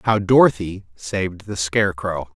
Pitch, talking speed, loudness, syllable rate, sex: 95 Hz, 125 wpm, -19 LUFS, 4.7 syllables/s, male